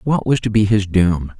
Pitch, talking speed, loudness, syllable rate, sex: 105 Hz, 260 wpm, -16 LUFS, 4.7 syllables/s, male